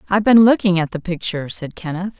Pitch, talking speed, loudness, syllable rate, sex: 185 Hz, 220 wpm, -17 LUFS, 6.5 syllables/s, female